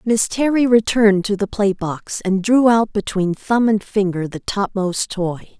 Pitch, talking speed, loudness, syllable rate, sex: 205 Hz, 180 wpm, -18 LUFS, 4.2 syllables/s, female